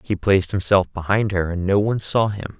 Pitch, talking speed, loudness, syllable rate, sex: 95 Hz, 230 wpm, -20 LUFS, 5.6 syllables/s, male